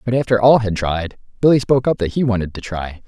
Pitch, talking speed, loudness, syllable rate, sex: 110 Hz, 255 wpm, -17 LUFS, 6.3 syllables/s, male